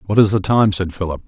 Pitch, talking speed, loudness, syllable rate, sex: 95 Hz, 285 wpm, -17 LUFS, 6.5 syllables/s, male